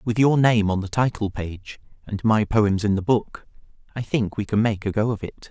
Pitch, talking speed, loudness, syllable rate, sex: 105 Hz, 240 wpm, -22 LUFS, 4.9 syllables/s, male